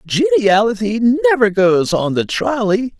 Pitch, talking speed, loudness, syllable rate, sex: 220 Hz, 120 wpm, -15 LUFS, 3.9 syllables/s, male